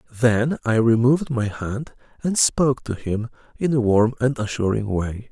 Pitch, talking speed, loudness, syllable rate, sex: 120 Hz, 170 wpm, -21 LUFS, 4.8 syllables/s, male